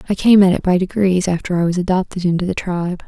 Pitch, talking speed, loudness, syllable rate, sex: 185 Hz, 255 wpm, -16 LUFS, 6.6 syllables/s, female